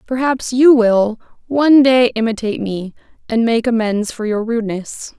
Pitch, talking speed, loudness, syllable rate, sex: 230 Hz, 150 wpm, -15 LUFS, 4.8 syllables/s, female